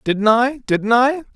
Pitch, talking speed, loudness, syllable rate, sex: 240 Hz, 175 wpm, -16 LUFS, 3.5 syllables/s, male